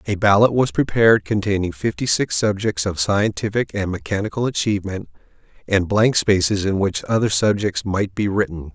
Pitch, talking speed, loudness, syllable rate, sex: 105 Hz, 160 wpm, -19 LUFS, 5.3 syllables/s, male